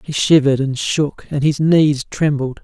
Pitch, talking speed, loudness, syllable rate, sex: 145 Hz, 180 wpm, -16 LUFS, 4.4 syllables/s, male